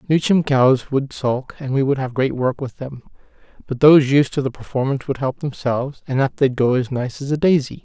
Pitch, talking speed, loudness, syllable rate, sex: 135 Hz, 235 wpm, -19 LUFS, 5.5 syllables/s, male